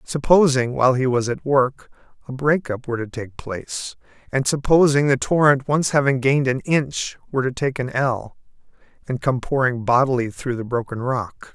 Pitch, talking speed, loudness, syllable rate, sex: 130 Hz, 175 wpm, -20 LUFS, 5.1 syllables/s, male